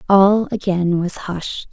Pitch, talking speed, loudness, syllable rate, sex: 190 Hz, 140 wpm, -18 LUFS, 3.3 syllables/s, female